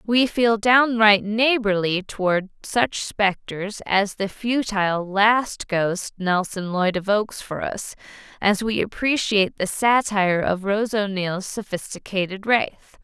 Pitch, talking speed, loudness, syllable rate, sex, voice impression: 205 Hz, 125 wpm, -21 LUFS, 3.8 syllables/s, female, feminine, adult-like, tensed, powerful, bright, clear, intellectual, calm, friendly, reassuring, slightly elegant, lively, kind, light